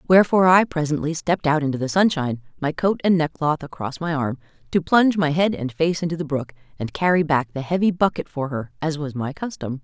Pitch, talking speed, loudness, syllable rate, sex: 155 Hz, 220 wpm, -21 LUFS, 6.1 syllables/s, female